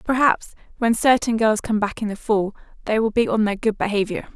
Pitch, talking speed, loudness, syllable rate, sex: 220 Hz, 220 wpm, -21 LUFS, 5.5 syllables/s, female